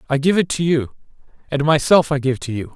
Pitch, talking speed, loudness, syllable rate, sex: 145 Hz, 240 wpm, -18 LUFS, 5.9 syllables/s, male